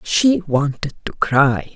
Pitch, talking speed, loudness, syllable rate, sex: 155 Hz, 135 wpm, -18 LUFS, 3.4 syllables/s, female